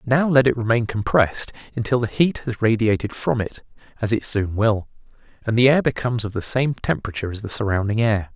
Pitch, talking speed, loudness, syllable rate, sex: 115 Hz, 200 wpm, -21 LUFS, 5.9 syllables/s, male